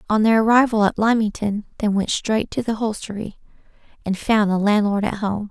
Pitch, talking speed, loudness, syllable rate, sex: 210 Hz, 185 wpm, -20 LUFS, 5.3 syllables/s, female